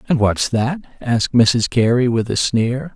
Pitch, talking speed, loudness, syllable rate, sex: 120 Hz, 185 wpm, -17 LUFS, 4.1 syllables/s, male